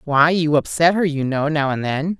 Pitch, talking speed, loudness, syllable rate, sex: 155 Hz, 245 wpm, -18 LUFS, 4.8 syllables/s, female